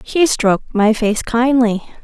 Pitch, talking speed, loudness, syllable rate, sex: 235 Hz, 145 wpm, -15 LUFS, 4.0 syllables/s, female